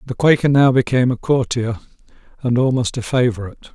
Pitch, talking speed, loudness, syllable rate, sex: 125 Hz, 160 wpm, -17 LUFS, 6.4 syllables/s, male